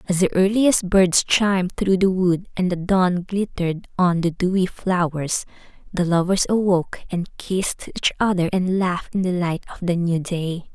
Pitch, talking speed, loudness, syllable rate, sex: 180 Hz, 180 wpm, -21 LUFS, 4.7 syllables/s, female